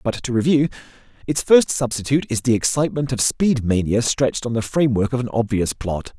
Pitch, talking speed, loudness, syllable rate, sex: 120 Hz, 195 wpm, -19 LUFS, 6.0 syllables/s, male